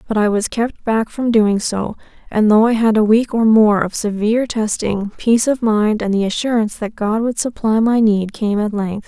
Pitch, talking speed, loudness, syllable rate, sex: 220 Hz, 225 wpm, -16 LUFS, 4.9 syllables/s, female